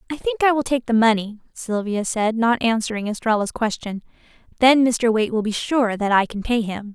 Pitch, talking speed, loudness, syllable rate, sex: 230 Hz, 205 wpm, -20 LUFS, 5.4 syllables/s, female